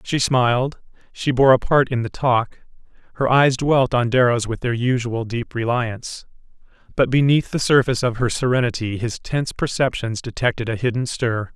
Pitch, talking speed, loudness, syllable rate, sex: 125 Hz, 170 wpm, -20 LUFS, 5.0 syllables/s, male